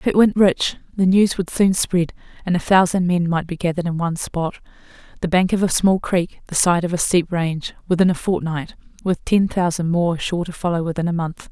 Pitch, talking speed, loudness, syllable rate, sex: 175 Hz, 220 wpm, -19 LUFS, 5.5 syllables/s, female